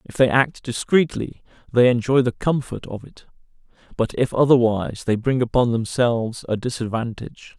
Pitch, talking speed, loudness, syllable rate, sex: 120 Hz, 150 wpm, -20 LUFS, 5.1 syllables/s, male